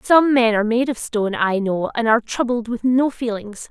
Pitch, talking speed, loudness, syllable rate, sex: 230 Hz, 225 wpm, -19 LUFS, 5.3 syllables/s, female